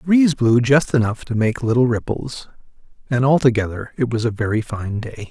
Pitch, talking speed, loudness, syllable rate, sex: 120 Hz, 190 wpm, -19 LUFS, 5.4 syllables/s, male